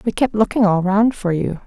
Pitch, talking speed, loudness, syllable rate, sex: 205 Hz, 255 wpm, -17 LUFS, 5.2 syllables/s, female